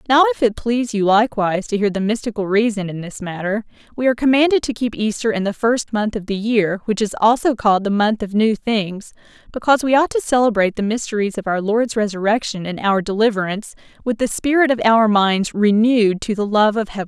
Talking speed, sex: 220 wpm, female